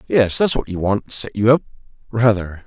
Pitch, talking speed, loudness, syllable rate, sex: 110 Hz, 200 wpm, -18 LUFS, 5.4 syllables/s, male